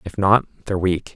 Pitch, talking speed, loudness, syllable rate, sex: 95 Hz, 205 wpm, -20 LUFS, 6.1 syllables/s, male